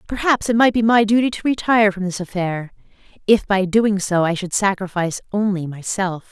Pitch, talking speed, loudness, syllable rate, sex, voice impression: 200 Hz, 190 wpm, -18 LUFS, 5.5 syllables/s, female, feminine, middle-aged, tensed, powerful, bright, clear, fluent, intellectual, friendly, elegant, lively